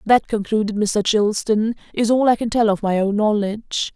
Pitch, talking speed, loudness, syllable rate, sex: 215 Hz, 195 wpm, -19 LUFS, 5.2 syllables/s, female